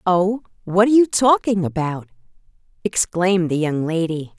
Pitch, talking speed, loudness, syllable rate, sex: 185 Hz, 135 wpm, -19 LUFS, 4.9 syllables/s, female